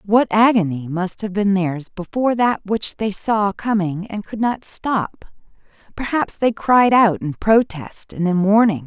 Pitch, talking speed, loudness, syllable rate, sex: 205 Hz, 170 wpm, -18 LUFS, 4.1 syllables/s, female